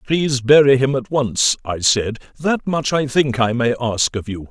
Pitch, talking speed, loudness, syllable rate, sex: 130 Hz, 215 wpm, -17 LUFS, 4.5 syllables/s, male